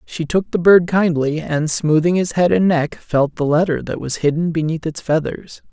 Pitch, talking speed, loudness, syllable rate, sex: 160 Hz, 210 wpm, -17 LUFS, 4.7 syllables/s, male